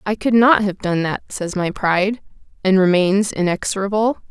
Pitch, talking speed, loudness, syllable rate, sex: 195 Hz, 165 wpm, -18 LUFS, 4.9 syllables/s, female